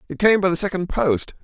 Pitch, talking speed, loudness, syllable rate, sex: 175 Hz, 250 wpm, -20 LUFS, 5.9 syllables/s, male